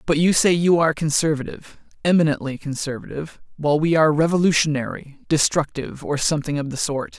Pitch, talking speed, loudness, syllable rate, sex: 155 Hz, 135 wpm, -20 LUFS, 6.4 syllables/s, male